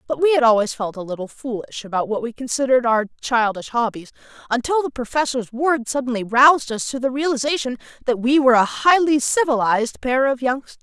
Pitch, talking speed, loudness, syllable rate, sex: 250 Hz, 190 wpm, -19 LUFS, 6.0 syllables/s, female